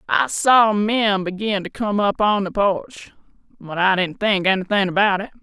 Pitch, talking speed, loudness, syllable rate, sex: 200 Hz, 175 wpm, -19 LUFS, 4.5 syllables/s, female